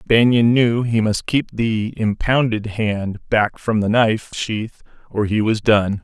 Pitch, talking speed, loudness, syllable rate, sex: 110 Hz, 170 wpm, -18 LUFS, 3.7 syllables/s, male